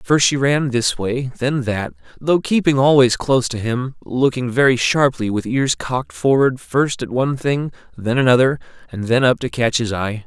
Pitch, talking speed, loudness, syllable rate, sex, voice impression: 130 Hz, 195 wpm, -18 LUFS, 4.8 syllables/s, male, masculine, adult-like, tensed, bright, clear, fluent, cool, intellectual, refreshing, calm, reassuring, modest